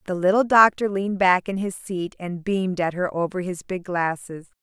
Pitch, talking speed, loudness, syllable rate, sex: 185 Hz, 205 wpm, -22 LUFS, 5.2 syllables/s, female